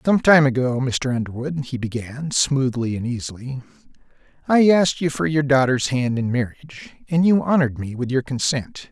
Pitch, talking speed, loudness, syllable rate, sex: 135 Hz, 175 wpm, -20 LUFS, 5.2 syllables/s, male